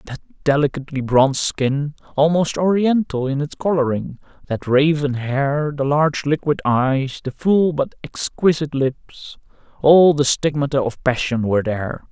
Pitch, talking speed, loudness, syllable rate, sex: 145 Hz, 135 wpm, -19 LUFS, 4.6 syllables/s, male